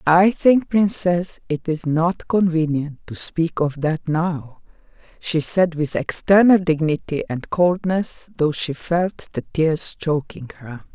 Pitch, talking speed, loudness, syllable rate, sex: 165 Hz, 145 wpm, -20 LUFS, 3.5 syllables/s, female